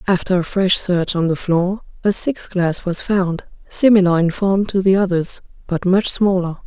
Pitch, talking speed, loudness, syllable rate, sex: 185 Hz, 190 wpm, -17 LUFS, 4.5 syllables/s, female